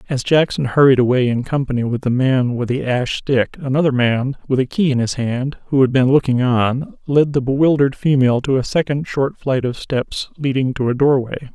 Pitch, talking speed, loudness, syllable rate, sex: 130 Hz, 215 wpm, -17 LUFS, 5.4 syllables/s, male